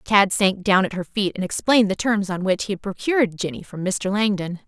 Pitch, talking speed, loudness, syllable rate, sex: 195 Hz, 245 wpm, -21 LUFS, 5.6 syllables/s, female